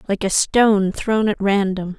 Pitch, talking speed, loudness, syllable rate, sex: 200 Hz, 180 wpm, -18 LUFS, 4.4 syllables/s, female